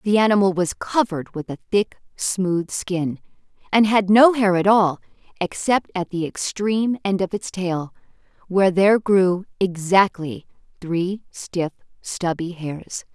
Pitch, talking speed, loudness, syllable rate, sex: 190 Hz, 140 wpm, -20 LUFS, 4.2 syllables/s, female